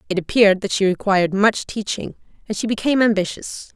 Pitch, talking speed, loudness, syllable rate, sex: 205 Hz, 175 wpm, -19 LUFS, 6.3 syllables/s, female